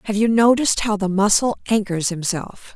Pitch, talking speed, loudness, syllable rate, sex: 205 Hz, 175 wpm, -18 LUFS, 5.4 syllables/s, female